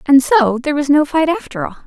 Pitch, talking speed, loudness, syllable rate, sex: 285 Hz, 255 wpm, -15 LUFS, 6.1 syllables/s, female